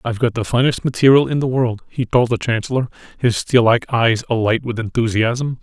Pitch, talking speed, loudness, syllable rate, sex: 120 Hz, 205 wpm, -17 LUFS, 5.5 syllables/s, male